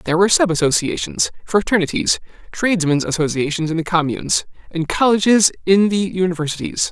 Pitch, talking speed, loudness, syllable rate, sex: 175 Hz, 130 wpm, -17 LUFS, 6.0 syllables/s, male